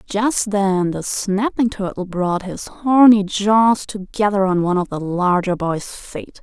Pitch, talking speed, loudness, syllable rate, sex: 200 Hz, 160 wpm, -18 LUFS, 3.8 syllables/s, female